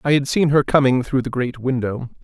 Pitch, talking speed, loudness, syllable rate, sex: 130 Hz, 240 wpm, -19 LUFS, 5.4 syllables/s, male